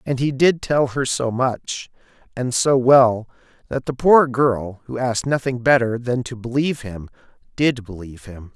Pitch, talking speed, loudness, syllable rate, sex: 125 Hz, 175 wpm, -19 LUFS, 4.5 syllables/s, male